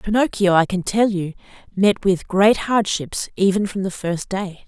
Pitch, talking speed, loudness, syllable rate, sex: 195 Hz, 180 wpm, -19 LUFS, 4.3 syllables/s, female